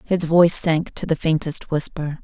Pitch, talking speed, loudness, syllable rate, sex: 160 Hz, 190 wpm, -19 LUFS, 4.7 syllables/s, female